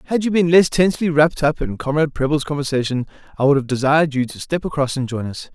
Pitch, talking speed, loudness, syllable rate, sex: 145 Hz, 240 wpm, -18 LUFS, 6.8 syllables/s, male